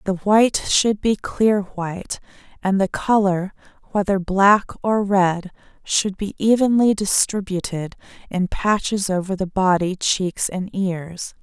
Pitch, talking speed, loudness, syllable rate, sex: 195 Hz, 130 wpm, -20 LUFS, 3.9 syllables/s, female